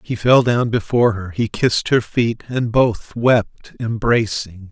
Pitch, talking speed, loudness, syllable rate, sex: 115 Hz, 165 wpm, -18 LUFS, 4.0 syllables/s, male